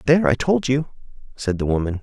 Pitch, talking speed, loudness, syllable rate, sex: 125 Hz, 210 wpm, -21 LUFS, 6.1 syllables/s, male